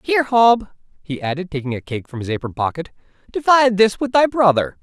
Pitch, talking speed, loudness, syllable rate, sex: 190 Hz, 200 wpm, -18 LUFS, 5.9 syllables/s, male